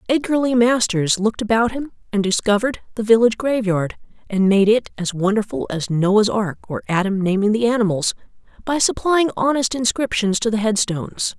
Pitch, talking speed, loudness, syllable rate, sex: 220 Hz, 165 wpm, -19 LUFS, 5.4 syllables/s, female